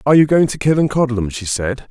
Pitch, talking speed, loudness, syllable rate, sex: 135 Hz, 220 wpm, -16 LUFS, 6.2 syllables/s, male